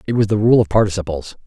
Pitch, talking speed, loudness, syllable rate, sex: 100 Hz, 245 wpm, -16 LUFS, 7.1 syllables/s, male